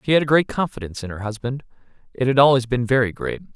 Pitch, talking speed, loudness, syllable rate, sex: 130 Hz, 235 wpm, -20 LUFS, 7.1 syllables/s, male